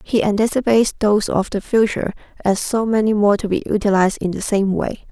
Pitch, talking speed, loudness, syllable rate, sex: 210 Hz, 200 wpm, -18 LUFS, 6.2 syllables/s, female